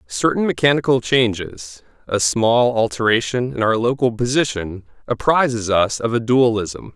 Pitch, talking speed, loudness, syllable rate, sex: 115 Hz, 130 wpm, -18 LUFS, 4.7 syllables/s, male